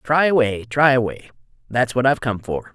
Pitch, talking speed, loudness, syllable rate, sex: 125 Hz, 195 wpm, -19 LUFS, 5.3 syllables/s, male